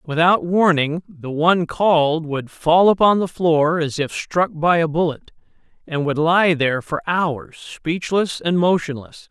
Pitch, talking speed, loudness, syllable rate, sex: 165 Hz, 160 wpm, -18 LUFS, 4.2 syllables/s, male